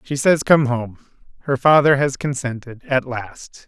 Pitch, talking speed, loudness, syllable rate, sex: 135 Hz, 145 wpm, -18 LUFS, 4.4 syllables/s, male